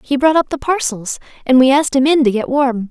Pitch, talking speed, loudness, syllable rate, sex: 270 Hz, 270 wpm, -14 LUFS, 5.8 syllables/s, female